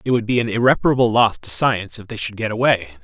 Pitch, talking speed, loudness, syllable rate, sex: 110 Hz, 255 wpm, -18 LUFS, 6.5 syllables/s, male